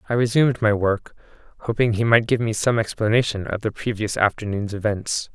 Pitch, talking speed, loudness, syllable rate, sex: 110 Hz, 180 wpm, -21 LUFS, 5.6 syllables/s, male